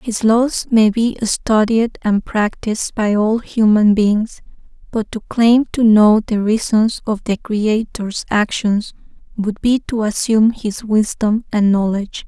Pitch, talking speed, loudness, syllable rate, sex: 215 Hz, 145 wpm, -16 LUFS, 3.8 syllables/s, female